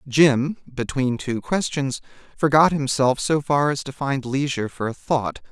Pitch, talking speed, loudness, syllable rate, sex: 135 Hz, 165 wpm, -22 LUFS, 4.3 syllables/s, male